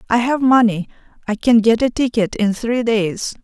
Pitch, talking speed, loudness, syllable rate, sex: 235 Hz, 190 wpm, -16 LUFS, 4.7 syllables/s, female